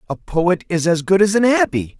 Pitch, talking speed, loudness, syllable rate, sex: 175 Hz, 240 wpm, -17 LUFS, 5.2 syllables/s, male